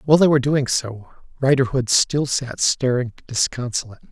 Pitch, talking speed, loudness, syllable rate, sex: 130 Hz, 145 wpm, -19 LUFS, 5.4 syllables/s, male